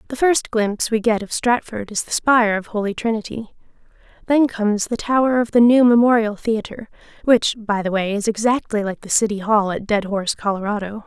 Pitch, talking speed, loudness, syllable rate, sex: 220 Hz, 195 wpm, -19 LUFS, 5.6 syllables/s, female